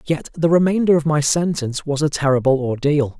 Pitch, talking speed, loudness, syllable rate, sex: 150 Hz, 190 wpm, -18 LUFS, 5.7 syllables/s, male